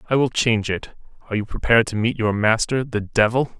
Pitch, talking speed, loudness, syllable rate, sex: 115 Hz, 215 wpm, -20 LUFS, 6.1 syllables/s, male